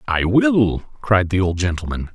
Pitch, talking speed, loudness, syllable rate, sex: 105 Hz, 170 wpm, -18 LUFS, 4.2 syllables/s, male